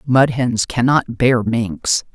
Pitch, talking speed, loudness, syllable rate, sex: 120 Hz, 140 wpm, -17 LUFS, 3.1 syllables/s, female